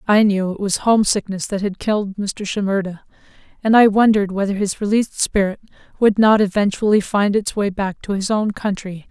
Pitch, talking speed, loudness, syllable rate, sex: 200 Hz, 185 wpm, -18 LUFS, 5.6 syllables/s, female